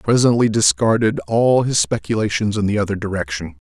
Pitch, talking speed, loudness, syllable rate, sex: 105 Hz, 165 wpm, -18 LUFS, 5.8 syllables/s, male